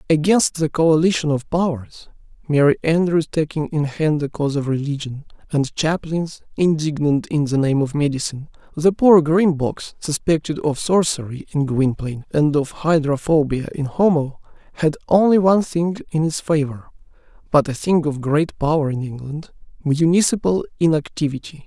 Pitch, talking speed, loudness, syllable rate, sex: 155 Hz, 140 wpm, -19 LUFS, 4.6 syllables/s, male